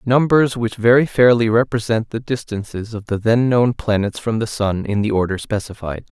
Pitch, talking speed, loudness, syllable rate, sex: 115 Hz, 185 wpm, -18 LUFS, 5.0 syllables/s, male